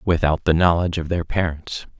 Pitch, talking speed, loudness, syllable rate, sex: 85 Hz, 180 wpm, -21 LUFS, 5.4 syllables/s, male